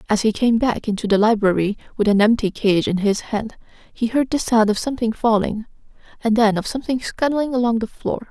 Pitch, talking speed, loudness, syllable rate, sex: 225 Hz, 210 wpm, -19 LUFS, 5.6 syllables/s, female